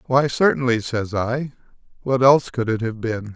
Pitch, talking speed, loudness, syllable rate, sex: 125 Hz, 180 wpm, -20 LUFS, 4.9 syllables/s, male